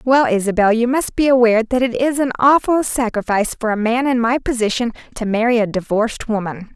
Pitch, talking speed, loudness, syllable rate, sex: 235 Hz, 205 wpm, -17 LUFS, 5.9 syllables/s, female